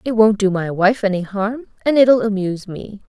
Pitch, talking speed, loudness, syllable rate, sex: 205 Hz, 210 wpm, -17 LUFS, 5.1 syllables/s, female